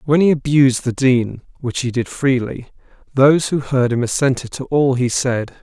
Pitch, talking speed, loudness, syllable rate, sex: 130 Hz, 190 wpm, -17 LUFS, 5.0 syllables/s, male